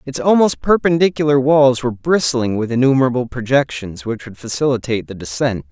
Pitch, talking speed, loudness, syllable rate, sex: 130 Hz, 145 wpm, -16 LUFS, 5.8 syllables/s, male